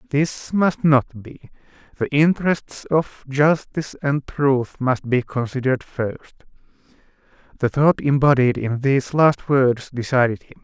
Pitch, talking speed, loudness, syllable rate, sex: 135 Hz, 130 wpm, -20 LUFS, 4.3 syllables/s, male